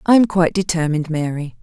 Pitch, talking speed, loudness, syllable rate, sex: 165 Hz, 185 wpm, -18 LUFS, 6.8 syllables/s, female